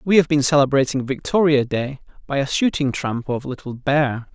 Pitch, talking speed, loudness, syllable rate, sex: 140 Hz, 180 wpm, -20 LUFS, 5.2 syllables/s, male